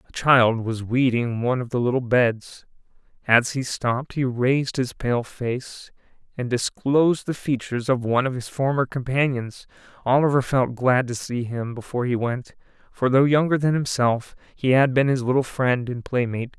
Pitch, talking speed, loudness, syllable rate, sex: 125 Hz, 175 wpm, -22 LUFS, 4.9 syllables/s, male